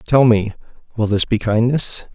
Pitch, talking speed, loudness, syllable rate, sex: 115 Hz, 170 wpm, -17 LUFS, 4.6 syllables/s, male